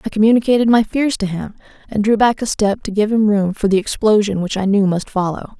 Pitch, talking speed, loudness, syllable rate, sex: 210 Hz, 245 wpm, -16 LUFS, 5.8 syllables/s, female